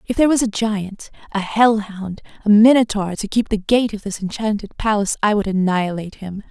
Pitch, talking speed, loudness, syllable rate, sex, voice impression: 210 Hz, 205 wpm, -18 LUFS, 5.6 syllables/s, female, very feminine, slightly adult-like, slightly cute, friendly, slightly reassuring, slightly kind